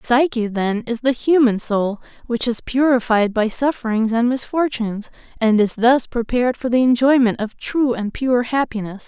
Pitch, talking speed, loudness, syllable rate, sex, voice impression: 240 Hz, 165 wpm, -18 LUFS, 4.8 syllables/s, female, feminine, adult-like, tensed, powerful, clear, raspy, intellectual, calm, friendly, reassuring, lively, slightly kind